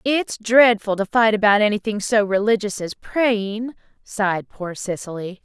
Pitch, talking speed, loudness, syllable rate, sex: 210 Hz, 145 wpm, -19 LUFS, 4.4 syllables/s, female